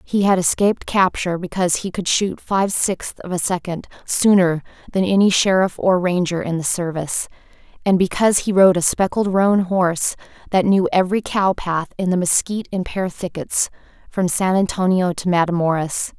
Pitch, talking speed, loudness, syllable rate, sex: 185 Hz, 170 wpm, -18 LUFS, 5.2 syllables/s, female